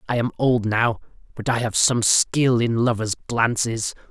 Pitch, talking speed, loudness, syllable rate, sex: 115 Hz, 175 wpm, -21 LUFS, 4.4 syllables/s, male